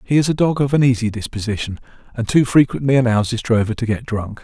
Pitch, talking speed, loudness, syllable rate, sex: 120 Hz, 230 wpm, -18 LUFS, 6.3 syllables/s, male